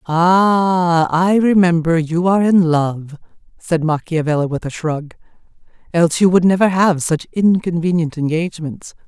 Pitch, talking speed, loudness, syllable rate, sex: 170 Hz, 125 wpm, -15 LUFS, 4.3 syllables/s, female